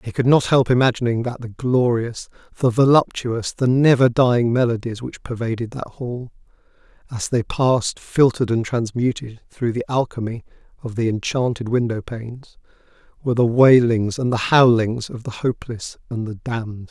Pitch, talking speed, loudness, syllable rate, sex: 120 Hz, 155 wpm, -19 LUFS, 5.1 syllables/s, male